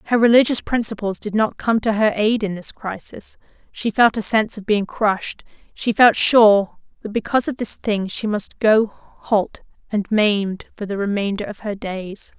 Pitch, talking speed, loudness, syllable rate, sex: 210 Hz, 190 wpm, -19 LUFS, 4.7 syllables/s, female